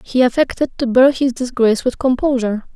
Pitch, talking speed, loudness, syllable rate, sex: 250 Hz, 175 wpm, -16 LUFS, 5.9 syllables/s, female